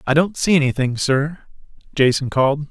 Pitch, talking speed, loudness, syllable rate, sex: 145 Hz, 155 wpm, -18 LUFS, 5.5 syllables/s, male